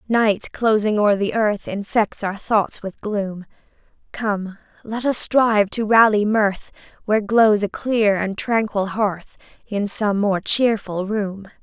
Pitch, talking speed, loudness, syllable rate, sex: 210 Hz, 150 wpm, -20 LUFS, 3.8 syllables/s, female